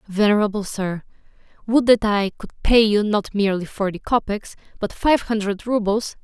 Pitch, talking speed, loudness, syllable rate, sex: 210 Hz, 155 wpm, -20 LUFS, 5.1 syllables/s, female